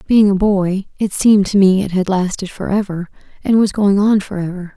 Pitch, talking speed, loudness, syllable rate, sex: 195 Hz, 225 wpm, -15 LUFS, 5.3 syllables/s, female